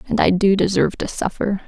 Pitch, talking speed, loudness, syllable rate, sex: 195 Hz, 215 wpm, -19 LUFS, 6.2 syllables/s, female